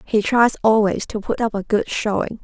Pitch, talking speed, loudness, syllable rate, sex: 215 Hz, 220 wpm, -19 LUFS, 4.9 syllables/s, female